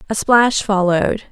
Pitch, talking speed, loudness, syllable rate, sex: 210 Hz, 135 wpm, -15 LUFS, 4.6 syllables/s, female